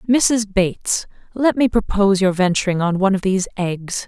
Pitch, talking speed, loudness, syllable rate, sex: 200 Hz, 175 wpm, -18 LUFS, 5.3 syllables/s, female